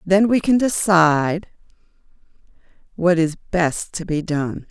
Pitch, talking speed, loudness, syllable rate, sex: 175 Hz, 125 wpm, -19 LUFS, 3.8 syllables/s, female